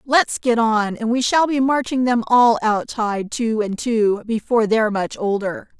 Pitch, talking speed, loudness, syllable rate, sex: 230 Hz, 195 wpm, -19 LUFS, 4.4 syllables/s, female